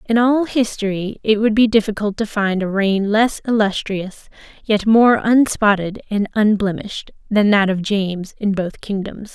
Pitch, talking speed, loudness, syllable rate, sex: 210 Hz, 160 wpm, -17 LUFS, 4.5 syllables/s, female